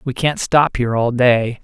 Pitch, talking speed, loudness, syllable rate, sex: 125 Hz, 220 wpm, -16 LUFS, 4.6 syllables/s, male